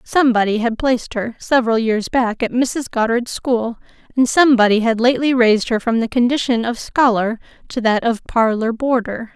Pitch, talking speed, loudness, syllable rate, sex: 235 Hz, 175 wpm, -17 LUFS, 5.3 syllables/s, female